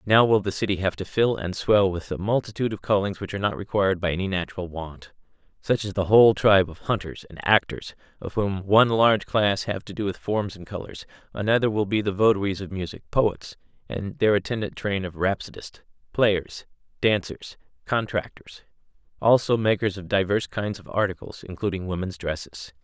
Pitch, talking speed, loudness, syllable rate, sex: 100 Hz, 180 wpm, -24 LUFS, 5.5 syllables/s, male